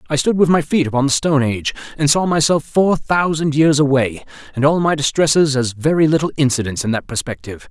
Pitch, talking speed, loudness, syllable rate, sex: 145 Hz, 210 wpm, -16 LUFS, 6.1 syllables/s, male